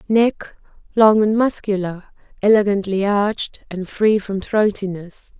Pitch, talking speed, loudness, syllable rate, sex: 205 Hz, 100 wpm, -18 LUFS, 4.2 syllables/s, female